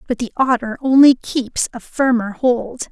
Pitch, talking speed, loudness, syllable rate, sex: 245 Hz, 165 wpm, -17 LUFS, 4.4 syllables/s, female